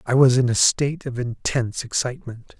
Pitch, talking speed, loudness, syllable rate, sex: 125 Hz, 185 wpm, -21 LUFS, 5.7 syllables/s, male